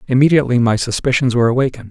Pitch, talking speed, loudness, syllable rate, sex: 125 Hz, 160 wpm, -15 LUFS, 8.6 syllables/s, male